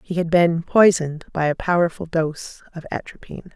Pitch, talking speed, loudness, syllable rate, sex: 170 Hz, 170 wpm, -20 LUFS, 5.3 syllables/s, female